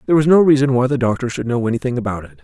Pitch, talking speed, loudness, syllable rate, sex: 130 Hz, 295 wpm, -16 LUFS, 7.9 syllables/s, male